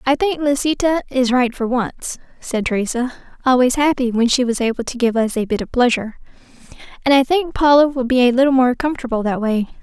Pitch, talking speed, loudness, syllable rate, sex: 255 Hz, 210 wpm, -17 LUFS, 5.9 syllables/s, female